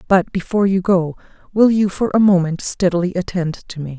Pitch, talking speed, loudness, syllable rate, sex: 185 Hz, 195 wpm, -17 LUFS, 5.5 syllables/s, female